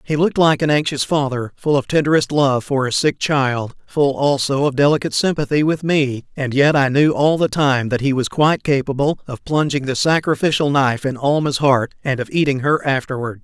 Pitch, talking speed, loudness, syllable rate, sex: 140 Hz, 200 wpm, -17 LUFS, 5.3 syllables/s, male